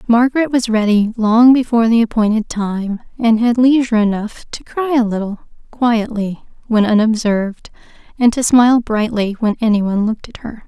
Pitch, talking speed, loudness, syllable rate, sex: 225 Hz, 165 wpm, -15 LUFS, 5.3 syllables/s, female